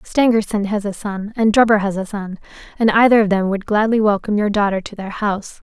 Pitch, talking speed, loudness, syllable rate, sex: 210 Hz, 220 wpm, -17 LUFS, 5.9 syllables/s, female